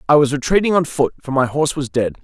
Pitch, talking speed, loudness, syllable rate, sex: 145 Hz, 270 wpm, -17 LUFS, 6.6 syllables/s, male